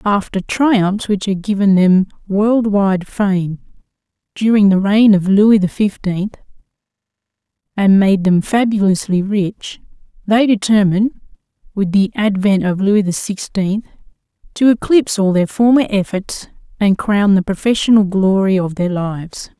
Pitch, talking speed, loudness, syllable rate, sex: 200 Hz, 130 wpm, -15 LUFS, 4.3 syllables/s, female